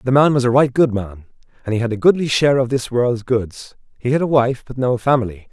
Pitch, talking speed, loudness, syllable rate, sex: 125 Hz, 260 wpm, -17 LUFS, 5.9 syllables/s, male